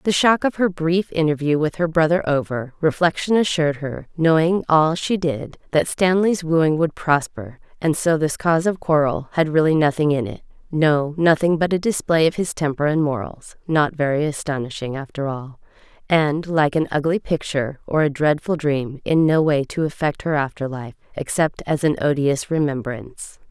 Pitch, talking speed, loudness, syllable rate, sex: 155 Hz, 175 wpm, -20 LUFS, 4.9 syllables/s, female